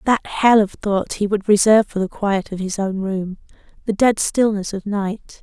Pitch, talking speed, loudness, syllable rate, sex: 205 Hz, 210 wpm, -19 LUFS, 4.6 syllables/s, female